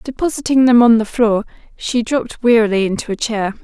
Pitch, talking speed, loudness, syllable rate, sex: 230 Hz, 180 wpm, -15 LUFS, 5.6 syllables/s, female